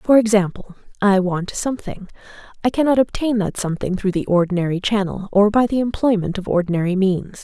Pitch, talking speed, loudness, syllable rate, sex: 205 Hz, 155 wpm, -19 LUFS, 5.8 syllables/s, female